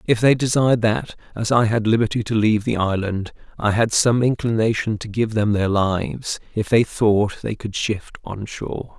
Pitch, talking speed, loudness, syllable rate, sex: 110 Hz, 195 wpm, -20 LUFS, 4.9 syllables/s, male